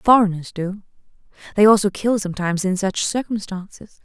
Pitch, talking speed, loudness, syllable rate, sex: 200 Hz, 135 wpm, -20 LUFS, 5.6 syllables/s, female